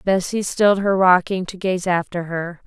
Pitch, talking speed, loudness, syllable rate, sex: 185 Hz, 180 wpm, -19 LUFS, 4.7 syllables/s, female